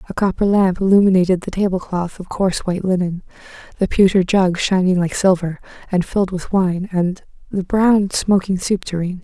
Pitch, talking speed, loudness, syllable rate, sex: 185 Hz, 170 wpm, -17 LUFS, 5.3 syllables/s, female